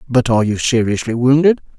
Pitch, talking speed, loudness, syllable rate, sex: 130 Hz, 170 wpm, -15 LUFS, 6.2 syllables/s, male